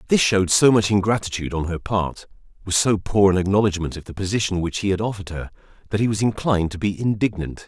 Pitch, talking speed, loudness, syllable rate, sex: 100 Hz, 210 wpm, -21 LUFS, 6.6 syllables/s, male